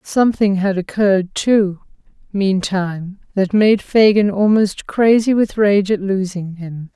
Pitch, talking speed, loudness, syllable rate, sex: 200 Hz, 130 wpm, -16 LUFS, 4.0 syllables/s, female